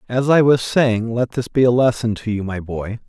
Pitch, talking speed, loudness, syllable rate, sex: 115 Hz, 255 wpm, -18 LUFS, 4.9 syllables/s, male